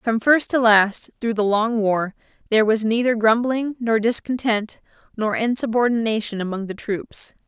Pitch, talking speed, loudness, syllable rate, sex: 225 Hz, 155 wpm, -20 LUFS, 4.6 syllables/s, female